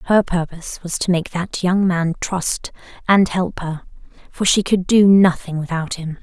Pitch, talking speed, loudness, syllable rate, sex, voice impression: 180 Hz, 185 wpm, -18 LUFS, 4.3 syllables/s, female, very feminine, slightly adult-like, thin, tensed, slightly powerful, dark, soft, slightly muffled, fluent, slightly raspy, very cute, very intellectual, slightly refreshing, sincere, very calm, very friendly, reassuring, unique, very elegant, wild, very sweet, kind, slightly intense, modest